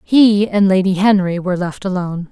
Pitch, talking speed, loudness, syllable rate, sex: 190 Hz, 180 wpm, -15 LUFS, 5.4 syllables/s, female